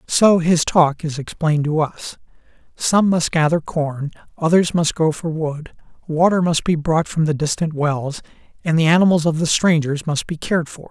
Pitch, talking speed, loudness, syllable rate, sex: 160 Hz, 185 wpm, -18 LUFS, 4.8 syllables/s, male